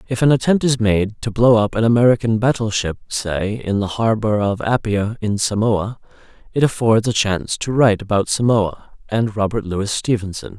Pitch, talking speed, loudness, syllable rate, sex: 110 Hz, 175 wpm, -18 LUFS, 5.0 syllables/s, male